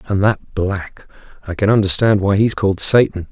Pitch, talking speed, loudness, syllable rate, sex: 100 Hz, 200 wpm, -16 LUFS, 5.5 syllables/s, male